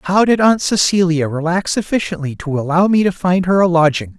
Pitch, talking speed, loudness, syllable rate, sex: 175 Hz, 200 wpm, -15 LUFS, 5.1 syllables/s, male